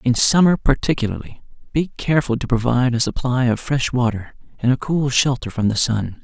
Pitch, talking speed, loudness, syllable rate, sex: 125 Hz, 185 wpm, -19 LUFS, 5.6 syllables/s, male